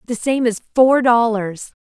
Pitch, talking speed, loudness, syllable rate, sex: 230 Hz, 165 wpm, -16 LUFS, 4.1 syllables/s, female